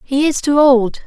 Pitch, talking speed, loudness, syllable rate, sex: 270 Hz, 225 wpm, -13 LUFS, 4.4 syllables/s, female